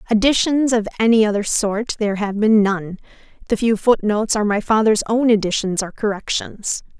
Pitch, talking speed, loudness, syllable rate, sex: 215 Hz, 165 wpm, -18 LUFS, 5.4 syllables/s, female